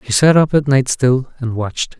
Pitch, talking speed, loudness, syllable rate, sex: 130 Hz, 240 wpm, -15 LUFS, 5.1 syllables/s, male